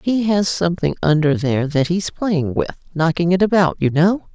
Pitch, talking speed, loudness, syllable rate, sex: 170 Hz, 195 wpm, -18 LUFS, 5.0 syllables/s, female